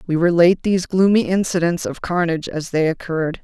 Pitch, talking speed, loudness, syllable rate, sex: 170 Hz, 175 wpm, -18 LUFS, 6.1 syllables/s, female